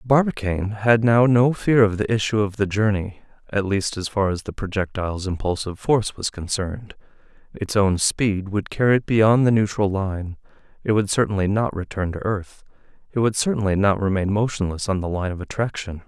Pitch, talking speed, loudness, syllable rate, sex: 105 Hz, 185 wpm, -21 LUFS, 5.4 syllables/s, male